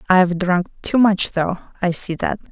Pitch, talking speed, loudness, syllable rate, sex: 185 Hz, 190 wpm, -19 LUFS, 4.5 syllables/s, female